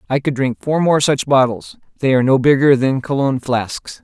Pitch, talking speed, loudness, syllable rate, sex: 135 Hz, 210 wpm, -16 LUFS, 5.3 syllables/s, male